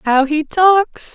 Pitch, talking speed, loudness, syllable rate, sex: 320 Hz, 160 wpm, -14 LUFS, 2.9 syllables/s, female